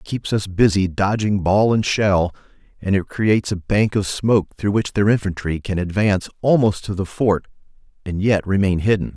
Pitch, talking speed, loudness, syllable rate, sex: 100 Hz, 190 wpm, -19 LUFS, 5.1 syllables/s, male